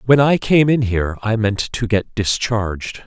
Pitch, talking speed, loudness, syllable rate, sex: 110 Hz, 195 wpm, -17 LUFS, 4.6 syllables/s, male